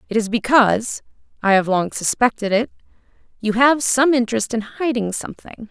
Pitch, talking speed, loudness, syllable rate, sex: 230 Hz, 135 wpm, -18 LUFS, 5.5 syllables/s, female